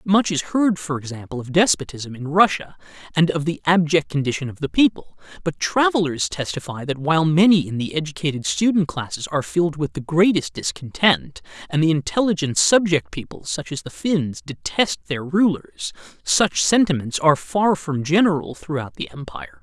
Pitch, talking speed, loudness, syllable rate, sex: 155 Hz, 170 wpm, -20 LUFS, 5.2 syllables/s, male